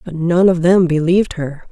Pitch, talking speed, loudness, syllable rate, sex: 170 Hz, 210 wpm, -14 LUFS, 5.0 syllables/s, female